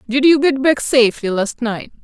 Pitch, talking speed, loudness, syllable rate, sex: 245 Hz, 205 wpm, -15 LUFS, 5.1 syllables/s, female